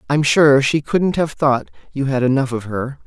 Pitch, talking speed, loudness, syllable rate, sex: 140 Hz, 215 wpm, -17 LUFS, 4.7 syllables/s, male